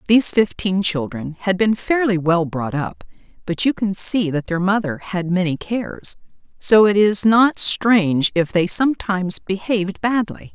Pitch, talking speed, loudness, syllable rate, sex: 190 Hz, 165 wpm, -18 LUFS, 4.5 syllables/s, female